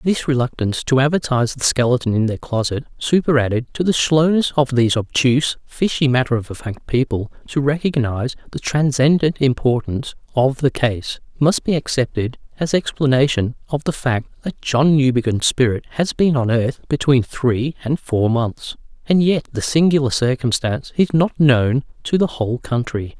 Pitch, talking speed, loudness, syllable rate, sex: 135 Hz, 160 wpm, -18 LUFS, 5.0 syllables/s, male